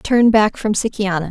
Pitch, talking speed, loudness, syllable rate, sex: 210 Hz, 185 wpm, -16 LUFS, 5.3 syllables/s, female